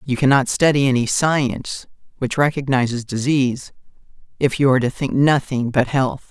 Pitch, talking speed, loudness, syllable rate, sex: 135 Hz, 150 wpm, -18 LUFS, 5.2 syllables/s, female